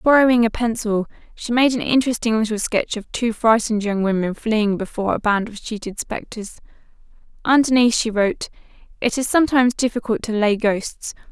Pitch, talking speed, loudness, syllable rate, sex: 225 Hz, 165 wpm, -19 LUFS, 5.6 syllables/s, female